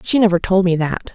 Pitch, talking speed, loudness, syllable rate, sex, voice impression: 185 Hz, 260 wpm, -16 LUFS, 5.8 syllables/s, female, feminine, adult-like, bright, soft, clear, fluent, intellectual, slightly calm, friendly, reassuring, elegant, kind, slightly modest